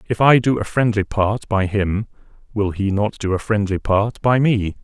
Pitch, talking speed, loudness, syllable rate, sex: 105 Hz, 210 wpm, -19 LUFS, 4.5 syllables/s, male